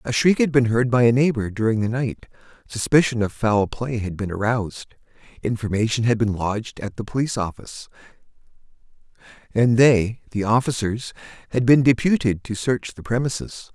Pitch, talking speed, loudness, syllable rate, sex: 115 Hz, 160 wpm, -21 LUFS, 5.3 syllables/s, male